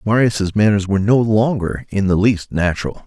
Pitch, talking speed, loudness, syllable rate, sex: 105 Hz, 175 wpm, -17 LUFS, 5.1 syllables/s, male